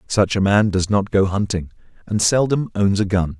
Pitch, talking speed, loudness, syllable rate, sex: 100 Hz, 210 wpm, -18 LUFS, 4.9 syllables/s, male